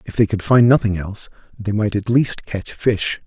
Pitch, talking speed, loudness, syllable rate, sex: 110 Hz, 220 wpm, -18 LUFS, 5.0 syllables/s, male